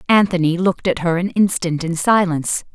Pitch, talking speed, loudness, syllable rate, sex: 175 Hz, 175 wpm, -17 LUFS, 5.7 syllables/s, female